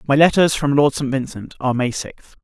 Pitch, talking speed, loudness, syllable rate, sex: 140 Hz, 220 wpm, -18 LUFS, 5.5 syllables/s, male